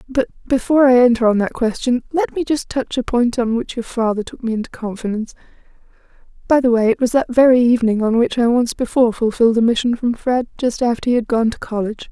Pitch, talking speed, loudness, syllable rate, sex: 240 Hz, 230 wpm, -17 LUFS, 6.3 syllables/s, female